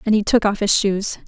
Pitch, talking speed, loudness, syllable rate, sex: 205 Hz, 280 wpm, -18 LUFS, 5.4 syllables/s, female